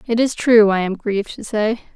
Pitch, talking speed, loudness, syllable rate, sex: 215 Hz, 245 wpm, -17 LUFS, 5.3 syllables/s, female